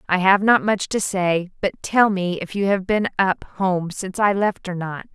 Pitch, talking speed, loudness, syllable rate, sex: 190 Hz, 235 wpm, -20 LUFS, 4.7 syllables/s, female